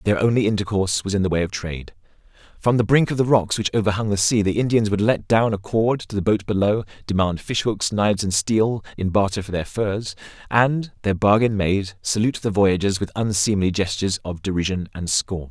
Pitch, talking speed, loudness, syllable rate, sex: 100 Hz, 215 wpm, -21 LUFS, 5.6 syllables/s, male